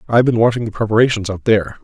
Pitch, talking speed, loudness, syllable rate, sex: 110 Hz, 230 wpm, -16 LUFS, 8.0 syllables/s, male